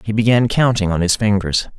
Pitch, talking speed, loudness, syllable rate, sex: 105 Hz, 200 wpm, -16 LUFS, 5.5 syllables/s, male